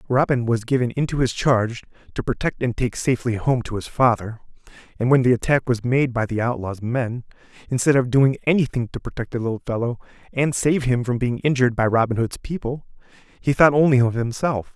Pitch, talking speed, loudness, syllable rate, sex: 125 Hz, 200 wpm, -21 LUFS, 5.7 syllables/s, male